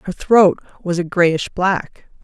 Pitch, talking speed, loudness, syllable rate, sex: 180 Hz, 160 wpm, -16 LUFS, 3.5 syllables/s, female